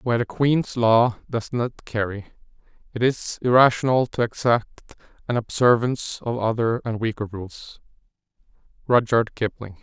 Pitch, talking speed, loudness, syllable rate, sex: 115 Hz, 120 wpm, -22 LUFS, 4.8 syllables/s, male